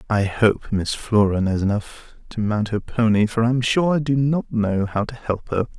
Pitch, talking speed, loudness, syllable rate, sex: 110 Hz, 230 wpm, -21 LUFS, 4.8 syllables/s, male